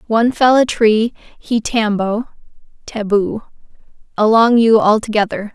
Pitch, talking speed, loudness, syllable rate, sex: 220 Hz, 95 wpm, -15 LUFS, 4.7 syllables/s, female